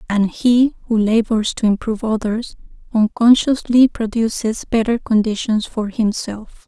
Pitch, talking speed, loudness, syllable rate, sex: 225 Hz, 115 wpm, -17 LUFS, 4.4 syllables/s, female